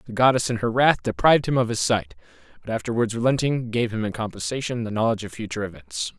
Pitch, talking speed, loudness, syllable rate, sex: 115 Hz, 215 wpm, -23 LUFS, 6.7 syllables/s, male